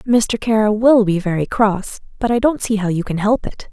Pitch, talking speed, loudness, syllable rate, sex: 215 Hz, 240 wpm, -17 LUFS, 5.1 syllables/s, female